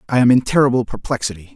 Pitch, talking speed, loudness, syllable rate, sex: 120 Hz, 195 wpm, -17 LUFS, 7.4 syllables/s, male